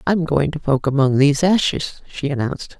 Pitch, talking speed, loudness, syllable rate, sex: 150 Hz, 195 wpm, -18 LUFS, 5.6 syllables/s, female